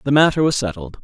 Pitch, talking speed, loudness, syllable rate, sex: 125 Hz, 230 wpm, -17 LUFS, 6.8 syllables/s, male